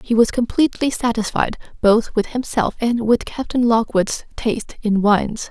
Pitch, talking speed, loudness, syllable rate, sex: 225 Hz, 155 wpm, -19 LUFS, 4.9 syllables/s, female